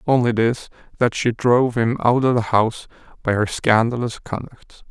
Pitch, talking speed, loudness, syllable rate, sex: 120 Hz, 170 wpm, -19 LUFS, 4.9 syllables/s, male